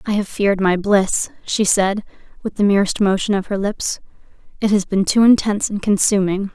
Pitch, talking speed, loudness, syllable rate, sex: 200 Hz, 190 wpm, -17 LUFS, 5.2 syllables/s, female